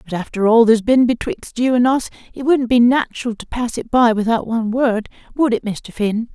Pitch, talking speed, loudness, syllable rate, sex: 235 Hz, 225 wpm, -17 LUFS, 5.4 syllables/s, female